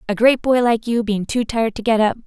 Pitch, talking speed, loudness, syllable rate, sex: 225 Hz, 290 wpm, -18 LUFS, 5.9 syllables/s, female